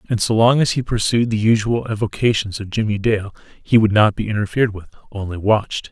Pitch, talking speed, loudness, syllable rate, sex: 110 Hz, 195 wpm, -18 LUFS, 5.9 syllables/s, male